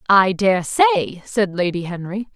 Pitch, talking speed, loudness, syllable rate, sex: 195 Hz, 155 wpm, -19 LUFS, 4.6 syllables/s, female